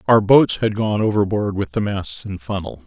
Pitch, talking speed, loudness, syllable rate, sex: 105 Hz, 210 wpm, -19 LUFS, 4.8 syllables/s, male